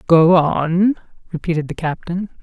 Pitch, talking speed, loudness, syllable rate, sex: 170 Hz, 125 wpm, -17 LUFS, 4.4 syllables/s, female